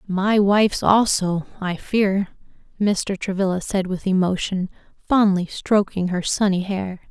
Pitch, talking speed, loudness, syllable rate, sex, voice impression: 195 Hz, 125 wpm, -20 LUFS, 4.1 syllables/s, female, very feminine, slightly adult-like, slightly soft, slightly cute, slightly calm, slightly sweet, kind